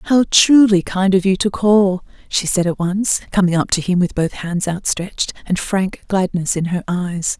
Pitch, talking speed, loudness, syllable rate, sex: 185 Hz, 205 wpm, -17 LUFS, 4.4 syllables/s, female